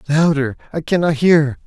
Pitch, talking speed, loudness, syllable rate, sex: 150 Hz, 110 wpm, -16 LUFS, 4.7 syllables/s, male